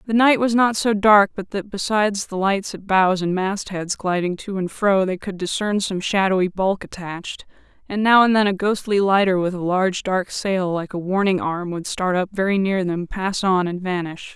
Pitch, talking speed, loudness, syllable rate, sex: 190 Hz, 215 wpm, -20 LUFS, 4.9 syllables/s, female